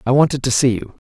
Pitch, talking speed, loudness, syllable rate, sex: 130 Hz, 280 wpm, -17 LUFS, 7.0 syllables/s, male